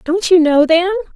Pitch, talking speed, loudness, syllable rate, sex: 340 Hz, 210 wpm, -12 LUFS, 5.3 syllables/s, female